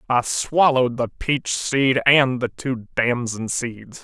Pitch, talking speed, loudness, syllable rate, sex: 125 Hz, 150 wpm, -20 LUFS, 3.6 syllables/s, male